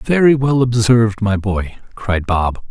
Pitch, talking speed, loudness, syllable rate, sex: 110 Hz, 155 wpm, -15 LUFS, 4.1 syllables/s, male